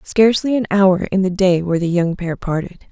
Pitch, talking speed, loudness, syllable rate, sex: 185 Hz, 225 wpm, -17 LUFS, 5.6 syllables/s, female